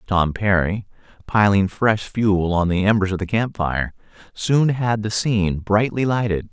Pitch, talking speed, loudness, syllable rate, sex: 100 Hz, 165 wpm, -20 LUFS, 4.3 syllables/s, male